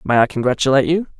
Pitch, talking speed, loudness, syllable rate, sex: 140 Hz, 200 wpm, -16 LUFS, 8.0 syllables/s, male